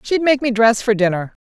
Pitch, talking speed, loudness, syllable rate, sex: 235 Hz, 250 wpm, -16 LUFS, 5.5 syllables/s, female